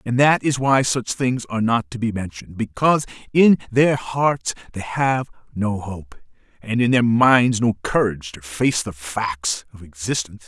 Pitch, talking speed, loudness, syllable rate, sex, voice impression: 115 Hz, 180 wpm, -20 LUFS, 4.5 syllables/s, male, very masculine, gender-neutral, slightly powerful, slightly hard, cool, mature, slightly unique, wild, slightly lively, slightly strict